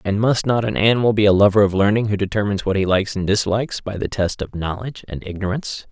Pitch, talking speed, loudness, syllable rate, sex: 105 Hz, 245 wpm, -19 LUFS, 6.7 syllables/s, male